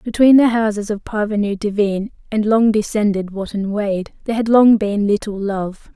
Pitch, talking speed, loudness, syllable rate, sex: 210 Hz, 170 wpm, -17 LUFS, 5.0 syllables/s, female